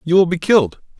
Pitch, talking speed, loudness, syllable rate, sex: 170 Hz, 240 wpm, -15 LUFS, 6.7 syllables/s, male